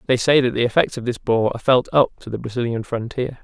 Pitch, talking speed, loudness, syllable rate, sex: 120 Hz, 260 wpm, -20 LUFS, 6.4 syllables/s, male